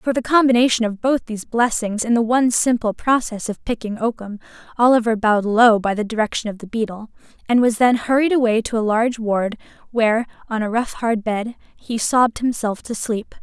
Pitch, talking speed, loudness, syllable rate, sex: 230 Hz, 195 wpm, -19 LUFS, 5.5 syllables/s, female